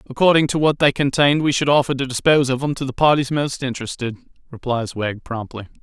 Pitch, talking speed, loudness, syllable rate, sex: 135 Hz, 205 wpm, -19 LUFS, 6.4 syllables/s, male